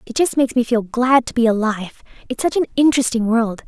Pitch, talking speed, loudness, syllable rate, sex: 240 Hz, 210 wpm, -17 LUFS, 6.0 syllables/s, female